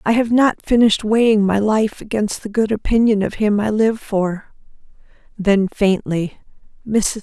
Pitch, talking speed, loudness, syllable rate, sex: 210 Hz, 150 wpm, -17 LUFS, 4.6 syllables/s, female